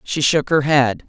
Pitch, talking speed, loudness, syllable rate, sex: 145 Hz, 220 wpm, -16 LUFS, 4.2 syllables/s, female